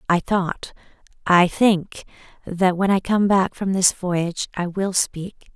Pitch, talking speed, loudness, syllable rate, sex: 185 Hz, 150 wpm, -20 LUFS, 3.7 syllables/s, female